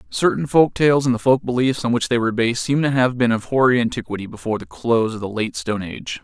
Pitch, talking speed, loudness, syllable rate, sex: 120 Hz, 260 wpm, -19 LUFS, 6.6 syllables/s, male